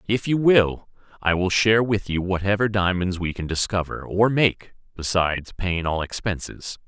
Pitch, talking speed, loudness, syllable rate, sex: 95 Hz, 165 wpm, -22 LUFS, 4.8 syllables/s, male